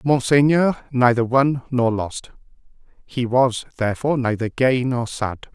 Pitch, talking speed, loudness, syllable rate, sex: 125 Hz, 130 wpm, -20 LUFS, 4.3 syllables/s, male